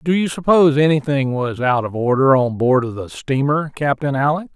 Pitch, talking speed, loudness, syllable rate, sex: 140 Hz, 200 wpm, -17 LUFS, 5.3 syllables/s, male